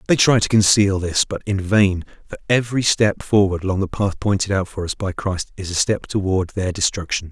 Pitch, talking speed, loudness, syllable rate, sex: 100 Hz, 220 wpm, -19 LUFS, 5.3 syllables/s, male